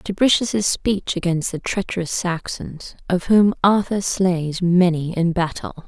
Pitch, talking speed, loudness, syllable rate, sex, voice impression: 180 Hz, 135 wpm, -20 LUFS, 3.9 syllables/s, female, feminine, slightly gender-neutral, very adult-like, slightly middle-aged, slightly thin, relaxed, slightly weak, slightly dark, soft, muffled, fluent, raspy, cool, intellectual, slightly refreshing, sincere, very calm, friendly, reassuring, slightly elegant, kind, very modest